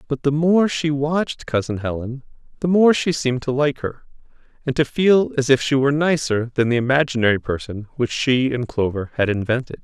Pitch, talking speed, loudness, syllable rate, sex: 135 Hz, 195 wpm, -19 LUFS, 5.4 syllables/s, male